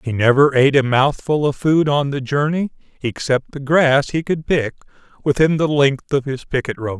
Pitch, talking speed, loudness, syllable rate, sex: 140 Hz, 195 wpm, -17 LUFS, 4.9 syllables/s, male